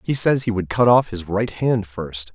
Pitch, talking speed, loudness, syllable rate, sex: 105 Hz, 255 wpm, -20 LUFS, 4.4 syllables/s, male